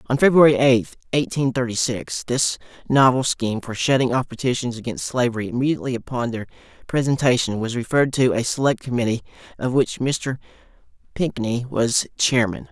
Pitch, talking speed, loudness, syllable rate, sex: 125 Hz, 145 wpm, -21 LUFS, 5.5 syllables/s, male